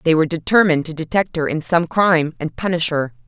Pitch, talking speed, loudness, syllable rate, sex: 165 Hz, 220 wpm, -18 LUFS, 6.3 syllables/s, female